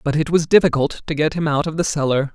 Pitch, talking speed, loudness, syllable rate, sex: 150 Hz, 280 wpm, -18 LUFS, 6.3 syllables/s, male